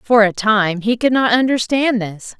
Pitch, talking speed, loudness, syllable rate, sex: 225 Hz, 200 wpm, -15 LUFS, 4.3 syllables/s, female